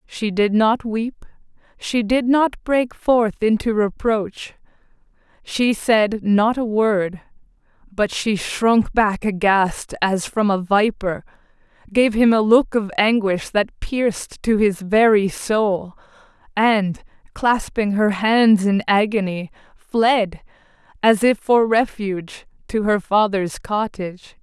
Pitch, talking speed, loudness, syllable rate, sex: 210 Hz, 130 wpm, -19 LUFS, 3.5 syllables/s, female